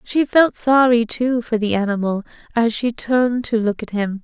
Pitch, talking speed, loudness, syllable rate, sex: 230 Hz, 200 wpm, -18 LUFS, 4.7 syllables/s, female